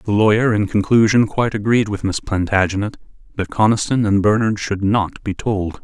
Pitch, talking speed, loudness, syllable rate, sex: 105 Hz, 175 wpm, -17 LUFS, 5.2 syllables/s, male